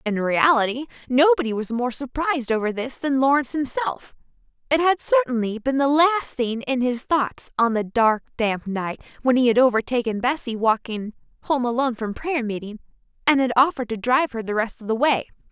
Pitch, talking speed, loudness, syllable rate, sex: 250 Hz, 185 wpm, -22 LUFS, 5.4 syllables/s, female